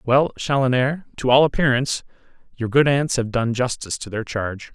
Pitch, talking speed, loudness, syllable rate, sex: 125 Hz, 175 wpm, -20 LUFS, 5.4 syllables/s, male